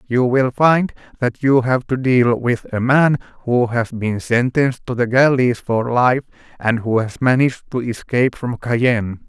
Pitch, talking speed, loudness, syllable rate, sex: 125 Hz, 180 wpm, -17 LUFS, 4.4 syllables/s, male